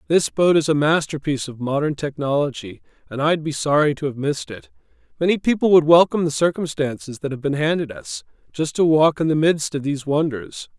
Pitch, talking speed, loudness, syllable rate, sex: 150 Hz, 200 wpm, -20 LUFS, 5.8 syllables/s, male